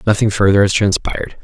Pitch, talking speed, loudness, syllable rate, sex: 100 Hz, 170 wpm, -14 LUFS, 6.3 syllables/s, male